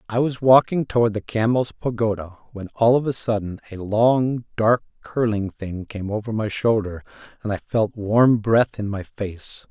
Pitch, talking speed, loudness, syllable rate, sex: 110 Hz, 180 wpm, -21 LUFS, 4.4 syllables/s, male